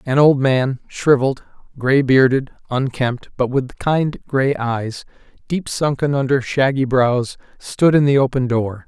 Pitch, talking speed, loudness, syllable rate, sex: 130 Hz, 150 wpm, -18 LUFS, 4.1 syllables/s, male